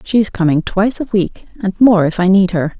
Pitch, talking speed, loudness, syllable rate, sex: 200 Hz, 235 wpm, -14 LUFS, 5.2 syllables/s, female